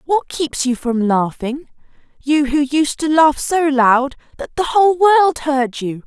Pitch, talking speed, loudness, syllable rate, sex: 285 Hz, 180 wpm, -16 LUFS, 3.9 syllables/s, female